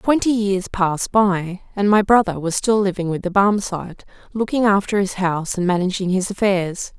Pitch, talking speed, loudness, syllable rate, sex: 195 Hz, 180 wpm, -19 LUFS, 5.2 syllables/s, female